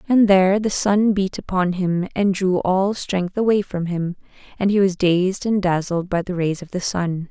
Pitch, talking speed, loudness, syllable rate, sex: 190 Hz, 215 wpm, -20 LUFS, 4.4 syllables/s, female